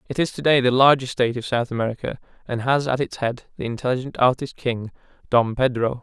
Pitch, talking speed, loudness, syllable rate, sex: 125 Hz, 210 wpm, -21 LUFS, 6.1 syllables/s, male